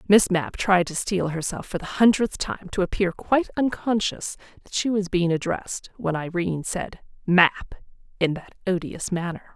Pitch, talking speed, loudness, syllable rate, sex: 185 Hz, 170 wpm, -24 LUFS, 4.9 syllables/s, female